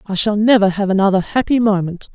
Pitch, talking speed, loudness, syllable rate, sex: 205 Hz, 195 wpm, -15 LUFS, 5.9 syllables/s, male